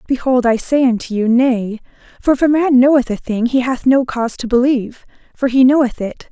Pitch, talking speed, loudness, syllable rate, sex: 250 Hz, 220 wpm, -15 LUFS, 5.6 syllables/s, female